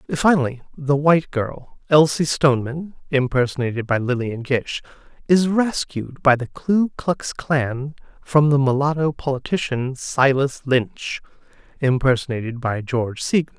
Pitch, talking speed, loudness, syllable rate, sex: 140 Hz, 120 wpm, -20 LUFS, 3.3 syllables/s, male